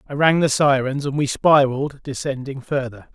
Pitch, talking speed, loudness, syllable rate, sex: 140 Hz, 170 wpm, -19 LUFS, 5.1 syllables/s, male